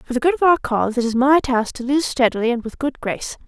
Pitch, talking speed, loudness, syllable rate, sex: 260 Hz, 295 wpm, -19 LUFS, 6.5 syllables/s, female